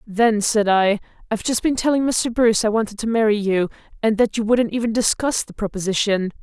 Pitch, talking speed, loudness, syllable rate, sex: 220 Hz, 205 wpm, -20 LUFS, 5.7 syllables/s, female